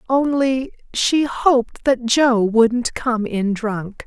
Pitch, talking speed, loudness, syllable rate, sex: 240 Hz, 135 wpm, -18 LUFS, 3.0 syllables/s, female